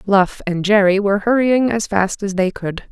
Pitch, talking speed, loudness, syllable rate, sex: 200 Hz, 205 wpm, -17 LUFS, 4.8 syllables/s, female